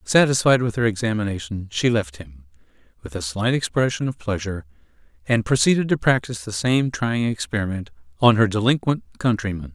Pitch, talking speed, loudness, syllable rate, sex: 105 Hz, 155 wpm, -21 LUFS, 5.7 syllables/s, male